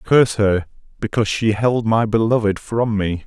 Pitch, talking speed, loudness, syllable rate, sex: 110 Hz, 165 wpm, -18 LUFS, 5.0 syllables/s, male